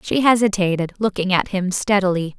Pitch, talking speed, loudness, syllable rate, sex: 195 Hz, 150 wpm, -19 LUFS, 5.4 syllables/s, female